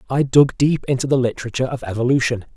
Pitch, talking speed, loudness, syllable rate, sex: 125 Hz, 190 wpm, -18 LUFS, 7.1 syllables/s, male